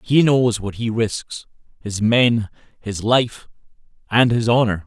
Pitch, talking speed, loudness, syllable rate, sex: 115 Hz, 150 wpm, -19 LUFS, 3.7 syllables/s, male